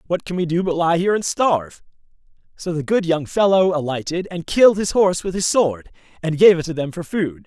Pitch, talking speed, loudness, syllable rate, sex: 170 Hz, 235 wpm, -19 LUFS, 5.8 syllables/s, male